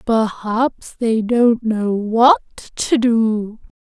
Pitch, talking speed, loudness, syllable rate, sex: 225 Hz, 110 wpm, -17 LUFS, 2.6 syllables/s, female